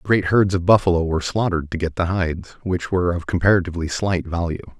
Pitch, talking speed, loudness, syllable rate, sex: 90 Hz, 200 wpm, -20 LUFS, 6.3 syllables/s, male